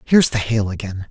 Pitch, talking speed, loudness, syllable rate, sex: 110 Hz, 215 wpm, -19 LUFS, 5.9 syllables/s, male